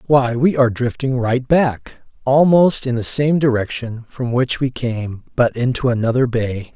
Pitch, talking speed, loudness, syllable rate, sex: 125 Hz, 170 wpm, -17 LUFS, 4.3 syllables/s, male